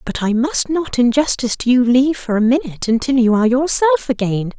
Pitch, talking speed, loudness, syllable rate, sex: 255 Hz, 220 wpm, -16 LUFS, 5.8 syllables/s, female